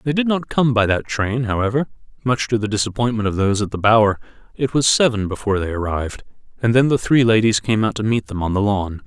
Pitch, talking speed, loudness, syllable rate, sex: 110 Hz, 240 wpm, -18 LUFS, 6.3 syllables/s, male